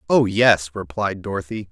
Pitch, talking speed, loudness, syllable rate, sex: 100 Hz, 140 wpm, -20 LUFS, 4.7 syllables/s, male